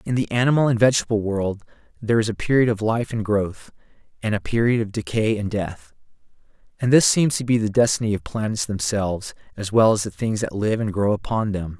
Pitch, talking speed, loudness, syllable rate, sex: 110 Hz, 215 wpm, -21 LUFS, 5.9 syllables/s, male